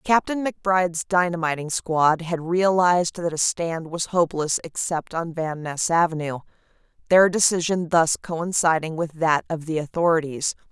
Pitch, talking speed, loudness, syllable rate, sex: 165 Hz, 140 wpm, -22 LUFS, 4.7 syllables/s, female